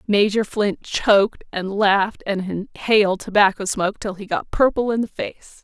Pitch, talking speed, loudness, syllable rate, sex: 200 Hz, 170 wpm, -20 LUFS, 4.7 syllables/s, female